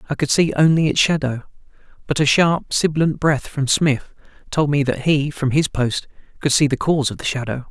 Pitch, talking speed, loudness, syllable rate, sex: 145 Hz, 210 wpm, -18 LUFS, 5.4 syllables/s, male